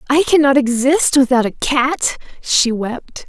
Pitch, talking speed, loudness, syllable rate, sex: 265 Hz, 145 wpm, -15 LUFS, 3.9 syllables/s, female